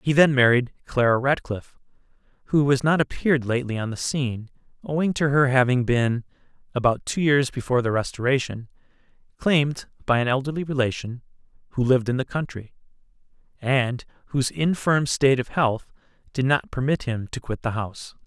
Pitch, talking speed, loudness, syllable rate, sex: 130 Hz, 160 wpm, -23 LUFS, 5.7 syllables/s, male